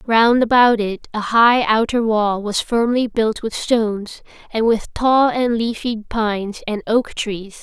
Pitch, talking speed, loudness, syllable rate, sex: 225 Hz, 165 wpm, -18 LUFS, 3.9 syllables/s, female